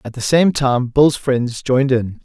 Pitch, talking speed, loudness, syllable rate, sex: 130 Hz, 215 wpm, -16 LUFS, 4.2 syllables/s, male